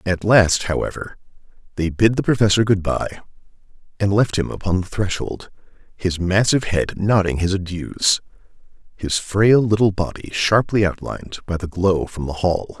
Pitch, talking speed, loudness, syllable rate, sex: 95 Hz, 155 wpm, -19 LUFS, 4.8 syllables/s, male